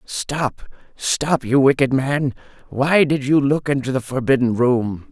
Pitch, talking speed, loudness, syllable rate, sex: 135 Hz, 150 wpm, -19 LUFS, 3.9 syllables/s, male